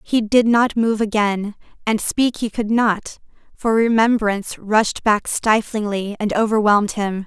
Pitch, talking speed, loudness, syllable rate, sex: 215 Hz, 150 wpm, -18 LUFS, 4.3 syllables/s, female